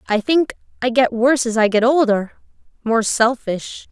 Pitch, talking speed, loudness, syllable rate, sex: 240 Hz, 170 wpm, -17 LUFS, 4.7 syllables/s, female